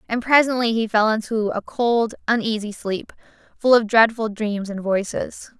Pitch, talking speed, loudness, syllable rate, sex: 220 Hz, 160 wpm, -20 LUFS, 4.6 syllables/s, female